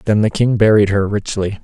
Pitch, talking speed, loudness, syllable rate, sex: 105 Hz, 220 wpm, -15 LUFS, 5.0 syllables/s, male